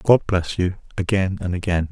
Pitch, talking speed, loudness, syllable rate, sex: 95 Hz, 190 wpm, -22 LUFS, 5.1 syllables/s, male